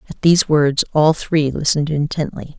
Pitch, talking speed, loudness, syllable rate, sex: 150 Hz, 160 wpm, -17 LUFS, 5.2 syllables/s, female